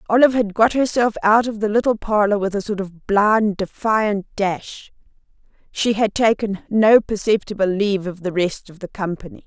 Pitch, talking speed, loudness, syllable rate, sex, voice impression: 205 Hz, 175 wpm, -19 LUFS, 4.9 syllables/s, female, feminine, middle-aged, slightly muffled, sincere, slightly calm, elegant